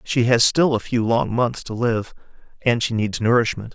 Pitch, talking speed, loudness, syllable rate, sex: 120 Hz, 210 wpm, -20 LUFS, 4.7 syllables/s, male